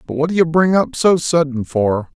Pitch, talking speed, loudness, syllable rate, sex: 155 Hz, 245 wpm, -16 LUFS, 5.1 syllables/s, male